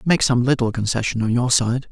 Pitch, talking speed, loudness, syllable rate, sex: 120 Hz, 220 wpm, -19 LUFS, 5.5 syllables/s, male